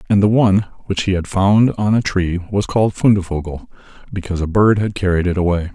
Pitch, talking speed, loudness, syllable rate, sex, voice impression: 95 Hz, 210 wpm, -16 LUFS, 5.7 syllables/s, male, masculine, middle-aged, thick, tensed, powerful, soft, clear, cool, sincere, calm, mature, friendly, reassuring, wild, lively, slightly kind